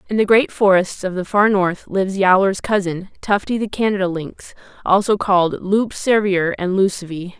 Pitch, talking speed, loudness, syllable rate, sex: 195 Hz, 170 wpm, -17 LUFS, 4.9 syllables/s, female